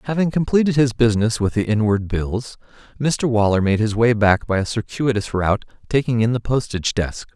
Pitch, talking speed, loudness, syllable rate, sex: 115 Hz, 190 wpm, -19 LUFS, 5.5 syllables/s, male